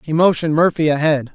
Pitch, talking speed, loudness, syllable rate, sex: 155 Hz, 180 wpm, -16 LUFS, 6.4 syllables/s, male